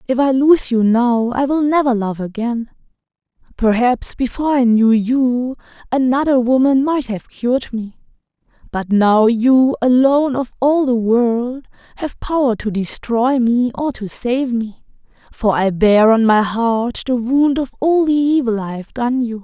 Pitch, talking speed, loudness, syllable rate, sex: 245 Hz, 165 wpm, -16 LUFS, 4.2 syllables/s, female